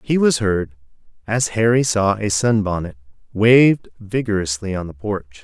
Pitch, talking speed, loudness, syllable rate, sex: 105 Hz, 145 wpm, -18 LUFS, 4.6 syllables/s, male